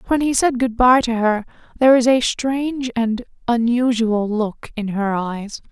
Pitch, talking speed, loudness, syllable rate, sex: 235 Hz, 180 wpm, -18 LUFS, 4.3 syllables/s, female